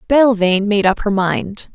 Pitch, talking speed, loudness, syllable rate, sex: 205 Hz, 170 wpm, -15 LUFS, 4.6 syllables/s, female